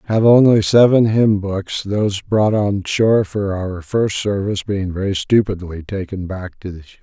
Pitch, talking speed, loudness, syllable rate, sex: 100 Hz, 180 wpm, -17 LUFS, 4.6 syllables/s, male